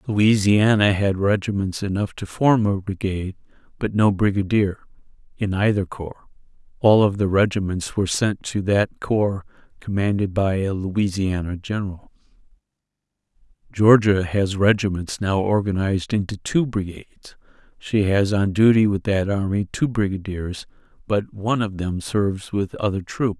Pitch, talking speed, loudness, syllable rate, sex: 100 Hz, 135 wpm, -21 LUFS, 4.8 syllables/s, male